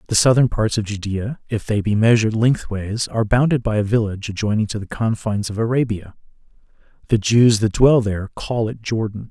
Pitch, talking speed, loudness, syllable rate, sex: 110 Hz, 185 wpm, -19 LUFS, 5.7 syllables/s, male